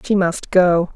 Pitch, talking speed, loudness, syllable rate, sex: 180 Hz, 190 wpm, -16 LUFS, 3.6 syllables/s, female